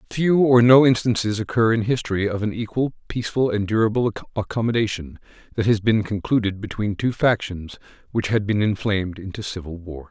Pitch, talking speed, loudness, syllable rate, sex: 105 Hz, 165 wpm, -21 LUFS, 5.7 syllables/s, male